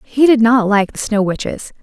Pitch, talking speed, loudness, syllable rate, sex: 225 Hz, 230 wpm, -14 LUFS, 4.8 syllables/s, female